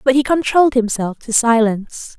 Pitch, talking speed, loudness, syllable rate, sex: 245 Hz, 165 wpm, -15 LUFS, 5.3 syllables/s, female